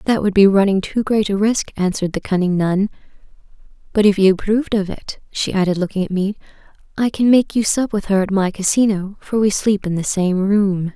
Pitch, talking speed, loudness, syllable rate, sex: 200 Hz, 220 wpm, -17 LUFS, 5.6 syllables/s, female